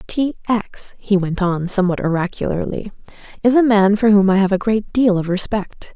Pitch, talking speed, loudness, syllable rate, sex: 200 Hz, 190 wpm, -17 LUFS, 5.1 syllables/s, female